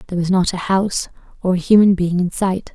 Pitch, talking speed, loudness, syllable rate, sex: 185 Hz, 240 wpm, -17 LUFS, 6.4 syllables/s, female